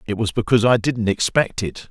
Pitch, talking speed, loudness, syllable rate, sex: 110 Hz, 220 wpm, -19 LUFS, 5.7 syllables/s, male